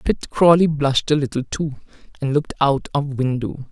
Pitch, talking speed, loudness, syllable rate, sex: 140 Hz, 180 wpm, -19 LUFS, 5.2 syllables/s, female